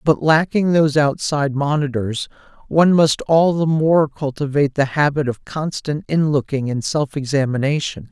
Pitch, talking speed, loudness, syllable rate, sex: 145 Hz, 140 wpm, -18 LUFS, 4.9 syllables/s, male